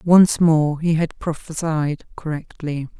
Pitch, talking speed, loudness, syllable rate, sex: 160 Hz, 120 wpm, -20 LUFS, 3.7 syllables/s, female